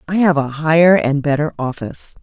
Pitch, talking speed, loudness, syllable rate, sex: 155 Hz, 190 wpm, -15 LUFS, 5.6 syllables/s, female